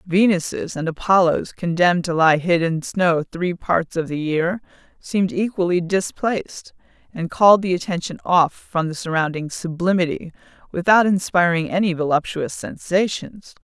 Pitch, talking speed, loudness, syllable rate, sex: 175 Hz, 135 wpm, -20 LUFS, 4.8 syllables/s, female